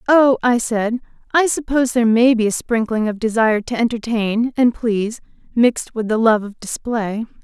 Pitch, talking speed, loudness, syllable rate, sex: 230 Hz, 180 wpm, -18 LUFS, 5.2 syllables/s, female